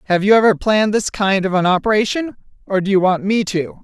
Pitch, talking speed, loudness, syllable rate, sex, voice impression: 200 Hz, 235 wpm, -16 LUFS, 6.0 syllables/s, female, slightly masculine, feminine, very gender-neutral, very adult-like, slightly middle-aged, slightly thin, very tensed, powerful, very bright, slightly hard, very clear, very fluent, cool, intellectual, very refreshing, sincere, slightly calm, very friendly, very reassuring, very unique, elegant, very wild, slightly sweet, very lively, slightly kind, intense, slightly light